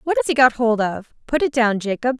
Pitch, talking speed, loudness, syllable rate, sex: 235 Hz, 275 wpm, -19 LUFS, 5.8 syllables/s, female